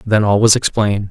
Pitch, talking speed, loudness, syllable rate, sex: 105 Hz, 215 wpm, -14 LUFS, 6.2 syllables/s, male